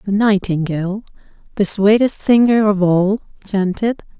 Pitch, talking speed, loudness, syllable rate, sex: 200 Hz, 115 wpm, -16 LUFS, 4.5 syllables/s, female